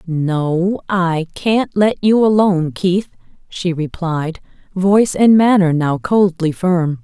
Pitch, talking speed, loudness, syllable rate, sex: 180 Hz, 130 wpm, -15 LUFS, 3.4 syllables/s, female